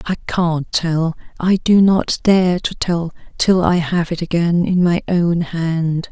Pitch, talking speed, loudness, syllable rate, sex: 170 Hz, 175 wpm, -17 LUFS, 3.6 syllables/s, female